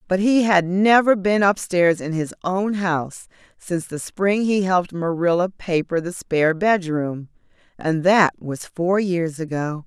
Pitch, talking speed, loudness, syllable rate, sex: 180 Hz, 160 wpm, -20 LUFS, 4.3 syllables/s, female